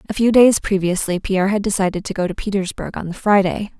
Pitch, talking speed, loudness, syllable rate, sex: 195 Hz, 220 wpm, -18 LUFS, 6.2 syllables/s, female